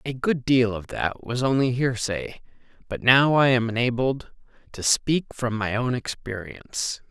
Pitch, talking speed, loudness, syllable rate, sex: 120 Hz, 160 wpm, -23 LUFS, 4.3 syllables/s, male